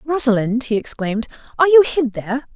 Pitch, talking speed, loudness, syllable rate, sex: 255 Hz, 165 wpm, -17 LUFS, 6.3 syllables/s, female